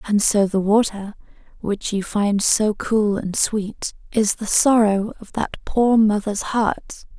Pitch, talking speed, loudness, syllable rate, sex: 210 Hz, 160 wpm, -19 LUFS, 3.6 syllables/s, female